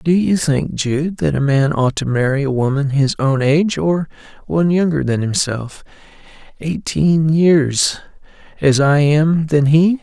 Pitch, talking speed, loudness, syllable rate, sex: 150 Hz, 150 wpm, -16 LUFS, 4.2 syllables/s, male